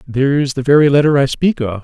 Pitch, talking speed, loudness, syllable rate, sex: 140 Hz, 260 wpm, -13 LUFS, 6.3 syllables/s, male